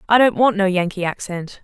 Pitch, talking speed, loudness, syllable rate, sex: 195 Hz, 220 wpm, -18 LUFS, 5.4 syllables/s, female